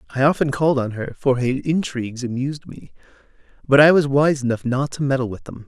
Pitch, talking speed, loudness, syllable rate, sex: 135 Hz, 210 wpm, -19 LUFS, 6.0 syllables/s, male